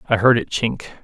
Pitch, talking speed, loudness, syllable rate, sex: 115 Hz, 230 wpm, -18 LUFS, 6.1 syllables/s, male